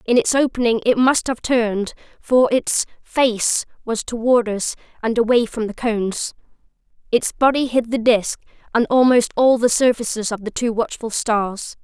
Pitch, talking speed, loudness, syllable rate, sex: 235 Hz, 155 wpm, -19 LUFS, 4.6 syllables/s, female